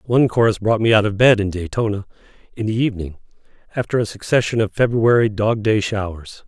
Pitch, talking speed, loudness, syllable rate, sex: 110 Hz, 165 wpm, -18 LUFS, 6.0 syllables/s, male